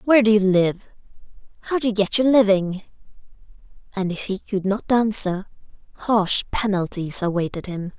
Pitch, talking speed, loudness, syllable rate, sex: 200 Hz, 150 wpm, -20 LUFS, 5.0 syllables/s, female